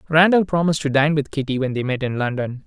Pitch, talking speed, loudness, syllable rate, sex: 145 Hz, 250 wpm, -20 LUFS, 6.4 syllables/s, male